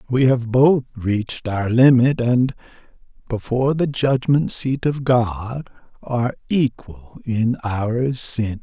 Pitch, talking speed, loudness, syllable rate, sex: 125 Hz, 125 wpm, -19 LUFS, 3.5 syllables/s, male